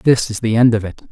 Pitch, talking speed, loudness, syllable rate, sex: 115 Hz, 320 wpm, -16 LUFS, 6.0 syllables/s, male